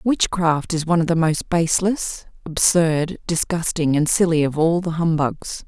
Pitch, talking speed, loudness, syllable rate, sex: 165 Hz, 160 wpm, -19 LUFS, 4.5 syllables/s, female